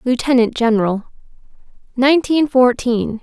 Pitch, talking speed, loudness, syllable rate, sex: 250 Hz, 75 wpm, -15 LUFS, 4.9 syllables/s, female